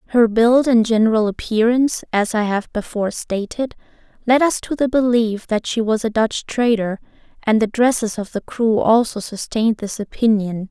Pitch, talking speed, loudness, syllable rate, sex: 225 Hz, 175 wpm, -18 LUFS, 5.0 syllables/s, female